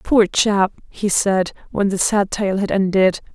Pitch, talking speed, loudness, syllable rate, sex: 195 Hz, 180 wpm, -18 LUFS, 4.0 syllables/s, female